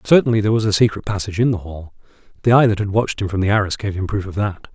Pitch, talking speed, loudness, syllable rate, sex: 105 Hz, 290 wpm, -18 LUFS, 7.6 syllables/s, male